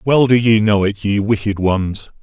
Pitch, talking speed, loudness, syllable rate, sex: 105 Hz, 215 wpm, -15 LUFS, 4.4 syllables/s, male